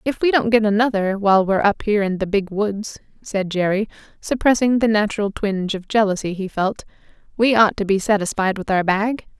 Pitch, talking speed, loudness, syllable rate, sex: 205 Hz, 200 wpm, -19 LUFS, 5.7 syllables/s, female